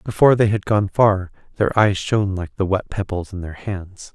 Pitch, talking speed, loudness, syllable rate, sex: 100 Hz, 215 wpm, -20 LUFS, 5.0 syllables/s, male